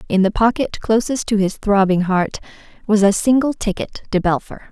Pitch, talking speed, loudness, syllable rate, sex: 210 Hz, 180 wpm, -18 LUFS, 5.2 syllables/s, female